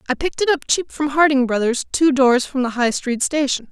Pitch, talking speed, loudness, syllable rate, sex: 275 Hz, 240 wpm, -18 LUFS, 5.5 syllables/s, female